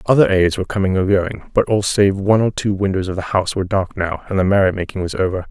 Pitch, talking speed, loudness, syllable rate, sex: 95 Hz, 260 wpm, -17 LUFS, 6.8 syllables/s, male